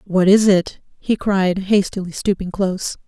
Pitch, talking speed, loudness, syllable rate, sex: 190 Hz, 155 wpm, -18 LUFS, 4.4 syllables/s, female